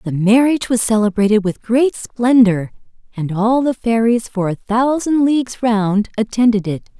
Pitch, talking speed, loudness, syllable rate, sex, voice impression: 225 Hz, 155 wpm, -16 LUFS, 4.6 syllables/s, female, feminine, adult-like, clear, fluent, slightly intellectual, slightly refreshing, friendly, reassuring